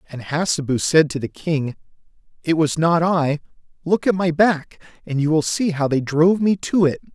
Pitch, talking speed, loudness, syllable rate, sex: 160 Hz, 200 wpm, -19 LUFS, 4.9 syllables/s, male